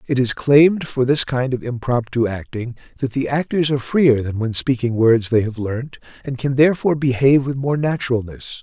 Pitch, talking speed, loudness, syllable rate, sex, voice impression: 130 Hz, 195 wpm, -18 LUFS, 5.4 syllables/s, male, masculine, middle-aged, slightly relaxed, powerful, slightly hard, raspy, slightly calm, mature, wild, lively, slightly strict